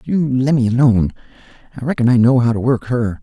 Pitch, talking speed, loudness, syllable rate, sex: 120 Hz, 205 wpm, -15 LUFS, 6.1 syllables/s, male